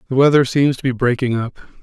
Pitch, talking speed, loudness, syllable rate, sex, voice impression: 130 Hz, 230 wpm, -16 LUFS, 6.0 syllables/s, male, masculine, adult-like, thick, tensed, powerful, slightly soft, cool, intellectual, calm, mature, slightly friendly, reassuring, wild, lively